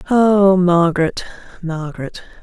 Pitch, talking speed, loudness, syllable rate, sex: 180 Hz, 75 wpm, -15 LUFS, 4.3 syllables/s, female